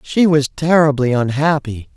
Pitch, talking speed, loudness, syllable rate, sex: 145 Hz, 120 wpm, -15 LUFS, 4.4 syllables/s, male